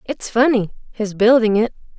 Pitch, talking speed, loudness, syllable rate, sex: 225 Hz, 120 wpm, -17 LUFS, 4.6 syllables/s, female